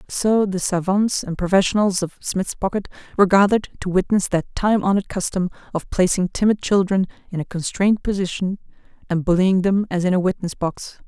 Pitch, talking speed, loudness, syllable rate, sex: 190 Hz, 175 wpm, -20 LUFS, 5.7 syllables/s, female